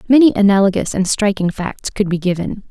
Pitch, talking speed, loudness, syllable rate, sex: 200 Hz, 175 wpm, -16 LUFS, 5.7 syllables/s, female